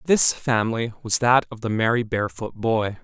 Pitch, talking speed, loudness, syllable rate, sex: 115 Hz, 180 wpm, -22 LUFS, 5.1 syllables/s, male